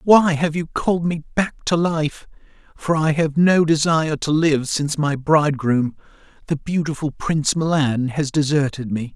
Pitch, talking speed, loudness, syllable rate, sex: 155 Hz, 165 wpm, -19 LUFS, 4.7 syllables/s, male